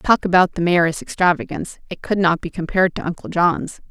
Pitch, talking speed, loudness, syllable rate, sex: 180 Hz, 200 wpm, -19 LUFS, 5.9 syllables/s, female